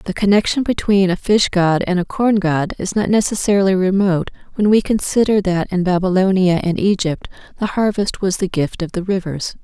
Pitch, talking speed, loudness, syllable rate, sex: 190 Hz, 185 wpm, -17 LUFS, 5.3 syllables/s, female